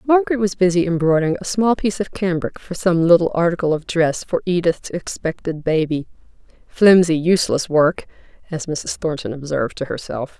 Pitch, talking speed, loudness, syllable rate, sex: 170 Hz, 155 wpm, -19 LUFS, 5.4 syllables/s, female